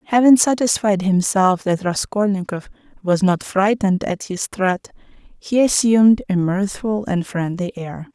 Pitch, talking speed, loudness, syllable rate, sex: 195 Hz, 135 wpm, -18 LUFS, 4.3 syllables/s, female